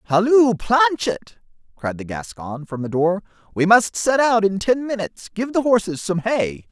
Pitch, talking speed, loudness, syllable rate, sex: 195 Hz, 180 wpm, -19 LUFS, 4.5 syllables/s, male